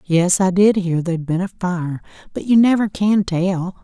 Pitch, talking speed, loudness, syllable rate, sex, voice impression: 185 Hz, 205 wpm, -17 LUFS, 4.5 syllables/s, female, feminine, adult-like, slightly soft, slightly sincere, very calm, slightly kind